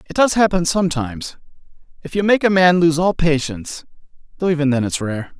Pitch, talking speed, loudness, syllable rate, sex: 160 Hz, 190 wpm, -17 LUFS, 6.0 syllables/s, male